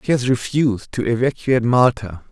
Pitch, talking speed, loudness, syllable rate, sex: 120 Hz, 155 wpm, -18 LUFS, 5.5 syllables/s, male